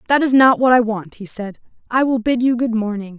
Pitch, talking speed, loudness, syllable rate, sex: 235 Hz, 265 wpm, -16 LUFS, 5.5 syllables/s, female